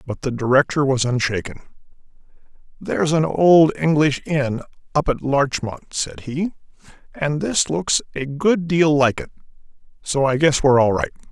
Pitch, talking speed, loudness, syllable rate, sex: 140 Hz, 155 wpm, -19 LUFS, 4.7 syllables/s, male